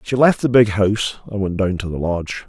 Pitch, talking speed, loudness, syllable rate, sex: 105 Hz, 265 wpm, -18 LUFS, 5.8 syllables/s, male